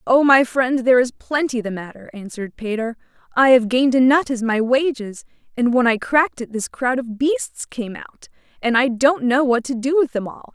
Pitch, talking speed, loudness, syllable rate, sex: 250 Hz, 220 wpm, -18 LUFS, 5.3 syllables/s, female